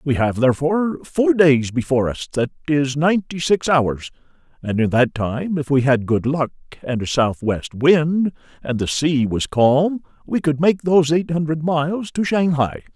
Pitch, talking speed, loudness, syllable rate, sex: 145 Hz, 180 wpm, -19 LUFS, 4.6 syllables/s, male